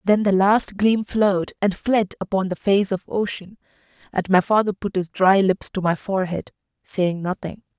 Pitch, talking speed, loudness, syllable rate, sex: 195 Hz, 185 wpm, -21 LUFS, 4.8 syllables/s, female